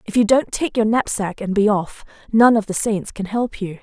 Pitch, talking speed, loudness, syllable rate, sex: 210 Hz, 250 wpm, -19 LUFS, 5.0 syllables/s, female